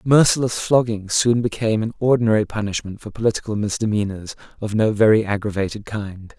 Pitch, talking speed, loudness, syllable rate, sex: 110 Hz, 140 wpm, -20 LUFS, 5.9 syllables/s, male